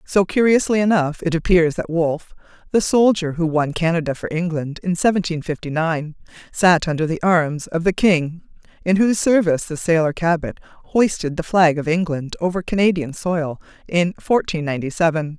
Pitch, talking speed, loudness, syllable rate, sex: 170 Hz, 170 wpm, -19 LUFS, 5.2 syllables/s, female